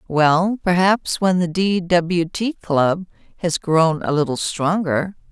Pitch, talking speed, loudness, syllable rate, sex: 175 Hz, 145 wpm, -19 LUFS, 3.4 syllables/s, female